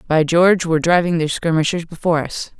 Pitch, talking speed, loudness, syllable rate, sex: 165 Hz, 185 wpm, -17 LUFS, 6.3 syllables/s, female